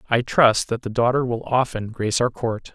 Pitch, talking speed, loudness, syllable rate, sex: 120 Hz, 220 wpm, -21 LUFS, 5.1 syllables/s, male